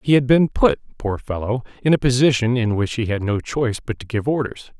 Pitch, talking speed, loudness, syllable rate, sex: 120 Hz, 240 wpm, -20 LUFS, 5.7 syllables/s, male